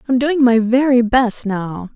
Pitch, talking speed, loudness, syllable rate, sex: 240 Hz, 185 wpm, -15 LUFS, 3.9 syllables/s, female